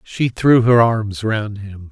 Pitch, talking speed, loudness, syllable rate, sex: 110 Hz, 190 wpm, -16 LUFS, 3.3 syllables/s, male